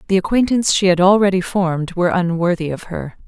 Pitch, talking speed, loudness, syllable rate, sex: 180 Hz, 185 wpm, -16 LUFS, 6.3 syllables/s, female